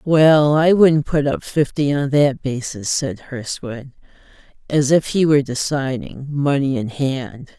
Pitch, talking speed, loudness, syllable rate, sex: 140 Hz, 150 wpm, -18 LUFS, 4.0 syllables/s, female